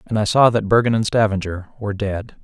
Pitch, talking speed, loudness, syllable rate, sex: 105 Hz, 220 wpm, -18 LUFS, 5.9 syllables/s, male